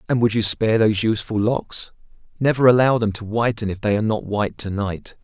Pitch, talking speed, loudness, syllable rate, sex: 110 Hz, 220 wpm, -20 LUFS, 5.9 syllables/s, male